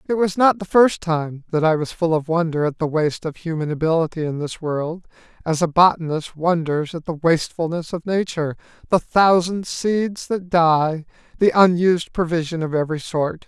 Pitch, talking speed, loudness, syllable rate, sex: 165 Hz, 185 wpm, -20 LUFS, 5.1 syllables/s, male